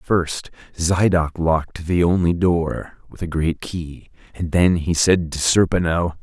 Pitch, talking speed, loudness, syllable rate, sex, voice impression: 85 Hz, 155 wpm, -19 LUFS, 3.8 syllables/s, male, very masculine, adult-like, slightly thick, cool, slightly intellectual, wild